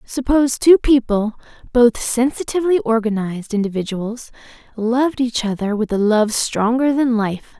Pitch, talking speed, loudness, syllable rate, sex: 235 Hz, 125 wpm, -18 LUFS, 4.8 syllables/s, female